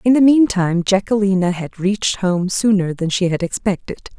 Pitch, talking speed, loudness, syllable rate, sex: 195 Hz, 170 wpm, -17 LUFS, 5.2 syllables/s, female